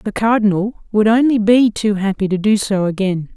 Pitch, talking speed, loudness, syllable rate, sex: 210 Hz, 195 wpm, -15 LUFS, 4.9 syllables/s, female